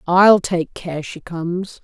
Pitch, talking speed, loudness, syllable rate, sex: 180 Hz, 165 wpm, -18 LUFS, 3.6 syllables/s, female